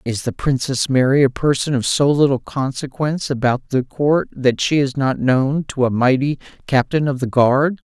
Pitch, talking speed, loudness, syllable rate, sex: 135 Hz, 190 wpm, -18 LUFS, 4.7 syllables/s, male